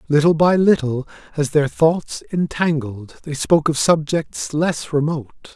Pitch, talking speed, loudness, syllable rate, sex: 150 Hz, 140 wpm, -18 LUFS, 4.5 syllables/s, male